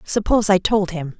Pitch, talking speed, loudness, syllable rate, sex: 190 Hz, 200 wpm, -18 LUFS, 5.5 syllables/s, female